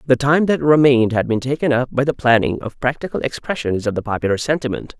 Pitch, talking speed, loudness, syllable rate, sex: 125 Hz, 215 wpm, -18 LUFS, 6.2 syllables/s, male